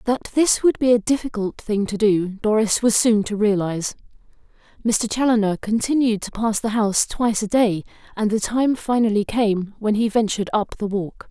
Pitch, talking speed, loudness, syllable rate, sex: 215 Hz, 185 wpm, -20 LUFS, 5.1 syllables/s, female